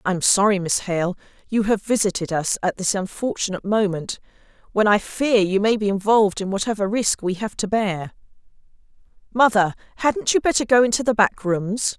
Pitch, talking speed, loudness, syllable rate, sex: 205 Hz, 175 wpm, -20 LUFS, 5.2 syllables/s, female